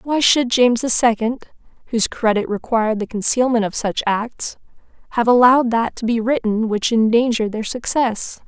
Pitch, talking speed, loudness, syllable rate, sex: 230 Hz, 165 wpm, -18 LUFS, 5.2 syllables/s, female